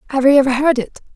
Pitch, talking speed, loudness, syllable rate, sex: 270 Hz, 260 wpm, -14 LUFS, 8.8 syllables/s, female